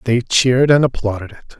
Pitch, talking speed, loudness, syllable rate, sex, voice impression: 120 Hz, 190 wpm, -15 LUFS, 5.5 syllables/s, male, very masculine, very adult-like, slightly old, thick, slightly tensed, powerful, slightly dark, slightly hard, muffled, fluent, very cool, very intellectual, sincere, very calm, very mature, friendly, very reassuring, unique, wild, slightly lively, kind, slightly intense